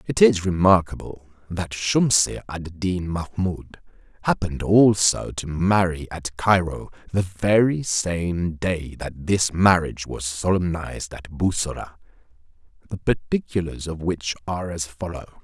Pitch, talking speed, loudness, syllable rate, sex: 90 Hz, 125 wpm, -22 LUFS, 4.3 syllables/s, male